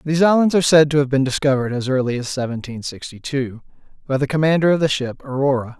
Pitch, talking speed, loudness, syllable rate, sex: 140 Hz, 220 wpm, -18 LUFS, 6.7 syllables/s, male